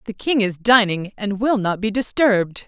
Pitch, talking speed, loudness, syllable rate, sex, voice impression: 210 Hz, 200 wpm, -19 LUFS, 4.8 syllables/s, female, very feminine, adult-like, slightly middle-aged, very thin, tensed, slightly powerful, bright, slightly soft, very clear, fluent, cool, very intellectual, refreshing, sincere, calm, very friendly, very reassuring, unique, elegant, slightly wild, slightly sweet, very lively, slightly strict, slightly intense